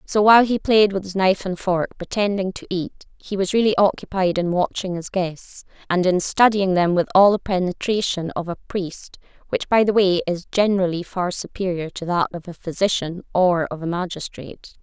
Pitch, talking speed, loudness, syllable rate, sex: 185 Hz, 195 wpm, -20 LUFS, 5.2 syllables/s, female